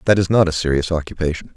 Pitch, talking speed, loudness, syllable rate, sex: 85 Hz, 230 wpm, -18 LUFS, 7.1 syllables/s, male